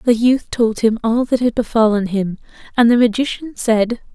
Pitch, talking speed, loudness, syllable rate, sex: 230 Hz, 190 wpm, -16 LUFS, 4.8 syllables/s, female